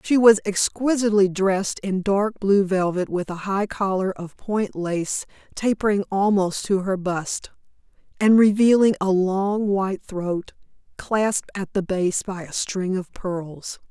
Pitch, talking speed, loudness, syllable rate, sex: 195 Hz, 150 wpm, -22 LUFS, 4.0 syllables/s, female